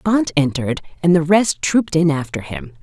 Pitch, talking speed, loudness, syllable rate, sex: 160 Hz, 190 wpm, -17 LUFS, 5.4 syllables/s, female